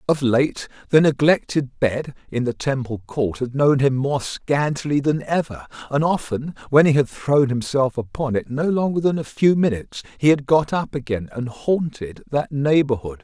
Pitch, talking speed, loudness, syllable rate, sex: 135 Hz, 180 wpm, -20 LUFS, 4.7 syllables/s, male